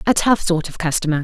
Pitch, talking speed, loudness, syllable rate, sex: 175 Hz, 240 wpm, -18 LUFS, 6.3 syllables/s, female